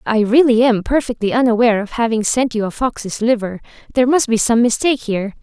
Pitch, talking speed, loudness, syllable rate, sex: 230 Hz, 200 wpm, -16 LUFS, 6.1 syllables/s, female